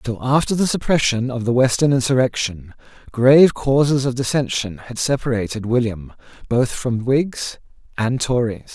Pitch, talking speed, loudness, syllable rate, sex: 125 Hz, 135 wpm, -19 LUFS, 4.7 syllables/s, male